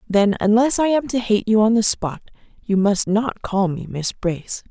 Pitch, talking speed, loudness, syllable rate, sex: 215 Hz, 215 wpm, -19 LUFS, 4.7 syllables/s, female